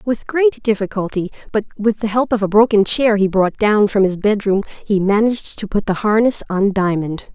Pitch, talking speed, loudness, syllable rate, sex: 210 Hz, 205 wpm, -17 LUFS, 5.1 syllables/s, female